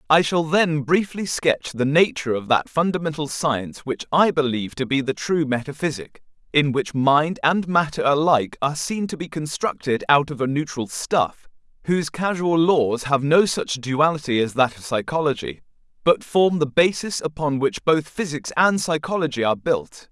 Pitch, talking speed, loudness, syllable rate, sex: 150 Hz, 175 wpm, -21 LUFS, 5.0 syllables/s, male